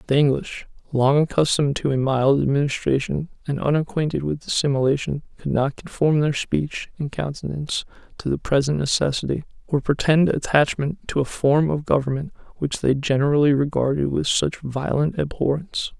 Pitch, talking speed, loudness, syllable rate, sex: 145 Hz, 145 wpm, -22 LUFS, 5.3 syllables/s, male